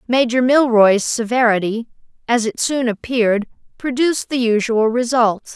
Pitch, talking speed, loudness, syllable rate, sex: 235 Hz, 120 wpm, -17 LUFS, 4.6 syllables/s, female